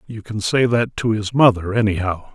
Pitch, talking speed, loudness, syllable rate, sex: 110 Hz, 205 wpm, -18 LUFS, 5.0 syllables/s, male